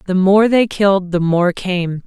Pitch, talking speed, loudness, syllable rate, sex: 190 Hz, 205 wpm, -15 LUFS, 4.2 syllables/s, female